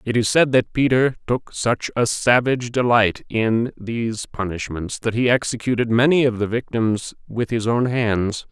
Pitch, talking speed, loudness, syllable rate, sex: 115 Hz, 170 wpm, -20 LUFS, 4.5 syllables/s, male